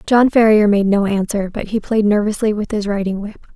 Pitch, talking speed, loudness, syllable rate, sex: 210 Hz, 220 wpm, -16 LUFS, 5.4 syllables/s, female